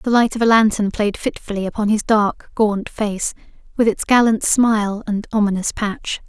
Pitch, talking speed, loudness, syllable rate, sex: 215 Hz, 180 wpm, -18 LUFS, 4.8 syllables/s, female